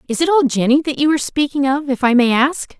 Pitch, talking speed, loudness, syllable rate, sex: 275 Hz, 280 wpm, -16 LUFS, 6.1 syllables/s, female